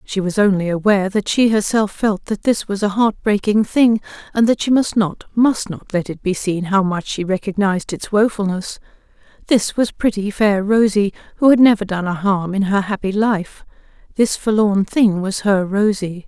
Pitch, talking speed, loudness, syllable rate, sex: 205 Hz, 190 wpm, -17 LUFS, 4.9 syllables/s, female